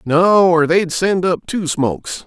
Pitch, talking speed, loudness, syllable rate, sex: 170 Hz, 185 wpm, -15 LUFS, 3.7 syllables/s, male